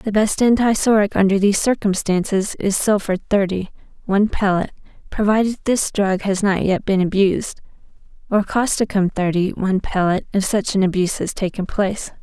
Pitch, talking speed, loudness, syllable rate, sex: 200 Hz, 155 wpm, -18 LUFS, 5.4 syllables/s, female